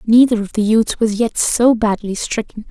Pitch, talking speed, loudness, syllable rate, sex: 225 Hz, 200 wpm, -16 LUFS, 4.6 syllables/s, female